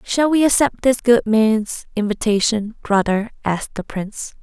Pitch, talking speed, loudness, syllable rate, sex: 225 Hz, 150 wpm, -18 LUFS, 4.6 syllables/s, female